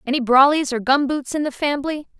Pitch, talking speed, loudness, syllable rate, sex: 275 Hz, 190 wpm, -19 LUFS, 5.5 syllables/s, female